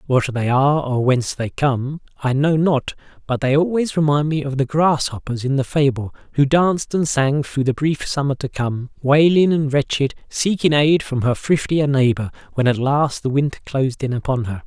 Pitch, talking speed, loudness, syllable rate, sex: 140 Hz, 200 wpm, -19 LUFS, 5.1 syllables/s, male